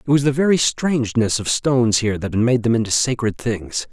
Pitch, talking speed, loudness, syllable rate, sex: 120 Hz, 230 wpm, -18 LUFS, 5.7 syllables/s, male